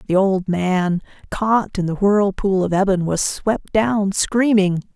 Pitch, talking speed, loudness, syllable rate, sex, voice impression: 195 Hz, 155 wpm, -18 LUFS, 3.6 syllables/s, female, feminine, adult-like, tensed, powerful, bright, clear, intellectual, friendly, elegant, lively, slightly strict, slightly sharp